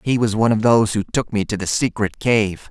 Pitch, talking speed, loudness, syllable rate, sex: 110 Hz, 265 wpm, -18 LUFS, 6.0 syllables/s, male